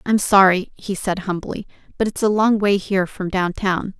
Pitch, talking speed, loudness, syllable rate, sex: 195 Hz, 195 wpm, -19 LUFS, 4.8 syllables/s, female